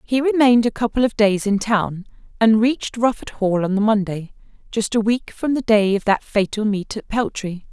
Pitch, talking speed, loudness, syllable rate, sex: 220 Hz, 200 wpm, -19 LUFS, 5.1 syllables/s, female